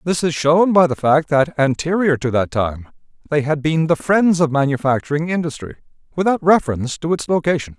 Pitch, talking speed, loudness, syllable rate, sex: 155 Hz, 185 wpm, -17 LUFS, 5.5 syllables/s, male